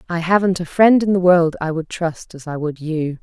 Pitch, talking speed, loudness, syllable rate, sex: 170 Hz, 260 wpm, -17 LUFS, 5.0 syllables/s, female